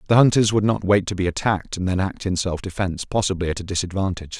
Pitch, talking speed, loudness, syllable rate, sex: 95 Hz, 245 wpm, -21 LUFS, 6.9 syllables/s, male